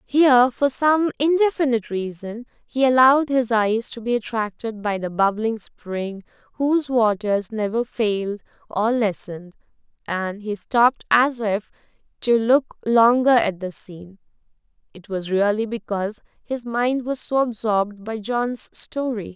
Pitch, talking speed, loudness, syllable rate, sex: 230 Hz, 140 wpm, -21 LUFS, 4.4 syllables/s, female